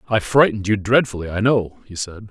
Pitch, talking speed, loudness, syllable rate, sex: 105 Hz, 210 wpm, -19 LUFS, 5.9 syllables/s, male